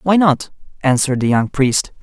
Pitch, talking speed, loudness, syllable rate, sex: 145 Hz, 180 wpm, -16 LUFS, 5.1 syllables/s, male